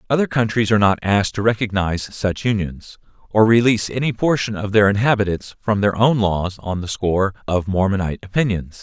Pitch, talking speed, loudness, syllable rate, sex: 105 Hz, 175 wpm, -19 LUFS, 5.8 syllables/s, male